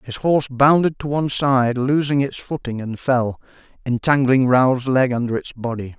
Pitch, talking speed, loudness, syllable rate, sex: 130 Hz, 170 wpm, -19 LUFS, 4.8 syllables/s, male